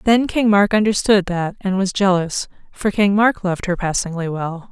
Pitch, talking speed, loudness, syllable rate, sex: 195 Hz, 190 wpm, -18 LUFS, 4.9 syllables/s, female